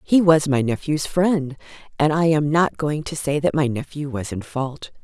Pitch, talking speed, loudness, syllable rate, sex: 145 Hz, 215 wpm, -21 LUFS, 4.5 syllables/s, female